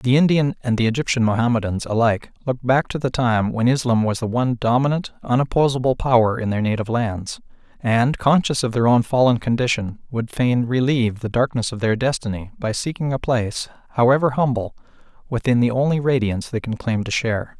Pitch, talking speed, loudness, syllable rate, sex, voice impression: 120 Hz, 185 wpm, -20 LUFS, 5.8 syllables/s, male, masculine, adult-like, slightly refreshing, slightly sincere, friendly, slightly kind